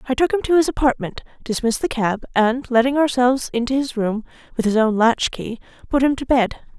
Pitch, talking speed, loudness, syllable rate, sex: 245 Hz, 210 wpm, -19 LUFS, 5.8 syllables/s, female